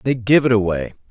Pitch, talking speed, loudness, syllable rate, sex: 115 Hz, 215 wpm, -17 LUFS, 5.9 syllables/s, male